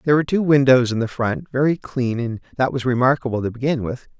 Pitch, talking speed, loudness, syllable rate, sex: 130 Hz, 230 wpm, -20 LUFS, 6.3 syllables/s, male